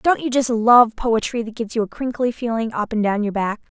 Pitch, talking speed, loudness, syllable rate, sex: 225 Hz, 255 wpm, -19 LUFS, 5.6 syllables/s, female